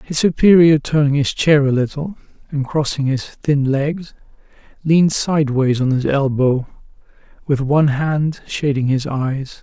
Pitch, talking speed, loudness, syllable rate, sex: 145 Hz, 145 wpm, -17 LUFS, 4.4 syllables/s, male